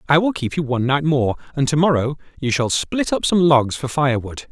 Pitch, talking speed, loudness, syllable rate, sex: 140 Hz, 240 wpm, -19 LUFS, 5.6 syllables/s, male